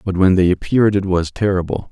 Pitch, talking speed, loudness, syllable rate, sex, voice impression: 95 Hz, 220 wpm, -16 LUFS, 6.1 syllables/s, male, masculine, middle-aged, thick, tensed, soft, muffled, cool, calm, reassuring, wild, kind, modest